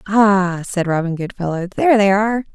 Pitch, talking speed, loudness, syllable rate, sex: 195 Hz, 165 wpm, -17 LUFS, 5.4 syllables/s, female